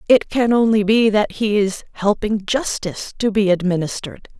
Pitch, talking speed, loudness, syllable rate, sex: 210 Hz, 165 wpm, -18 LUFS, 5.1 syllables/s, female